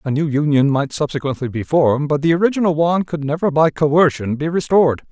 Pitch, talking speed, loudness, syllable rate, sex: 150 Hz, 200 wpm, -17 LUFS, 6.1 syllables/s, male